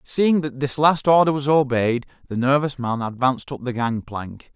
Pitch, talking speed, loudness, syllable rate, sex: 135 Hz, 185 wpm, -21 LUFS, 4.7 syllables/s, male